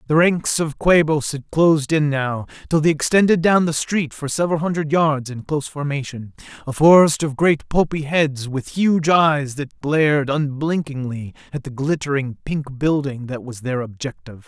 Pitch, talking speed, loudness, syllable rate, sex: 145 Hz, 170 wpm, -19 LUFS, 4.7 syllables/s, male